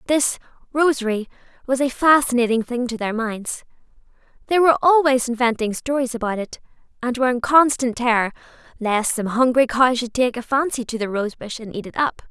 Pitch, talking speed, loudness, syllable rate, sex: 245 Hz, 180 wpm, -20 LUFS, 5.5 syllables/s, female